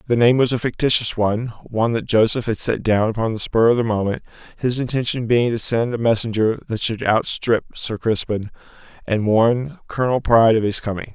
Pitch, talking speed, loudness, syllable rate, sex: 115 Hz, 195 wpm, -19 LUFS, 5.5 syllables/s, male